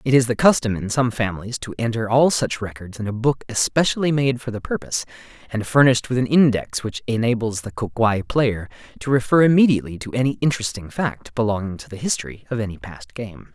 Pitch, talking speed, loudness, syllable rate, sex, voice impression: 115 Hz, 205 wpm, -20 LUFS, 6.0 syllables/s, male, masculine, adult-like, slightly clear, slightly cool, refreshing, slightly unique